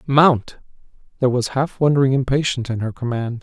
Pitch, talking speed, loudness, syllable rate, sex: 130 Hz, 160 wpm, -19 LUFS, 6.0 syllables/s, male